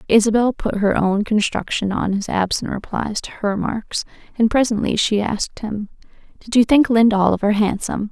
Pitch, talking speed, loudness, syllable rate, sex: 215 Hz, 170 wpm, -19 LUFS, 5.3 syllables/s, female